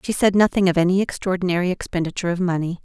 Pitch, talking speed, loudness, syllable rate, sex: 180 Hz, 190 wpm, -20 LUFS, 7.4 syllables/s, female